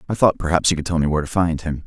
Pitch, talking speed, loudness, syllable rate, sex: 85 Hz, 355 wpm, -19 LUFS, 7.7 syllables/s, male